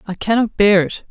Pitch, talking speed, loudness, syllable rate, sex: 205 Hz, 215 wpm, -15 LUFS, 5.2 syllables/s, female